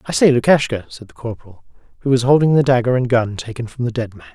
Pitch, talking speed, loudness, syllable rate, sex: 120 Hz, 250 wpm, -17 LUFS, 6.7 syllables/s, male